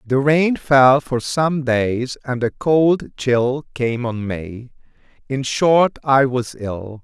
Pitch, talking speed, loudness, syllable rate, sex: 130 Hz, 155 wpm, -18 LUFS, 3.0 syllables/s, male